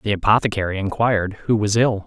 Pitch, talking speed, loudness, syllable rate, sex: 105 Hz, 175 wpm, -19 LUFS, 6.2 syllables/s, male